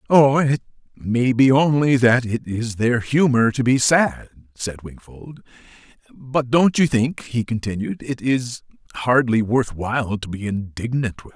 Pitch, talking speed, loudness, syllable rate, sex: 125 Hz, 165 wpm, -19 LUFS, 4.2 syllables/s, male